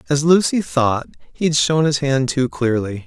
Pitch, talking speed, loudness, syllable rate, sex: 140 Hz, 195 wpm, -18 LUFS, 4.5 syllables/s, male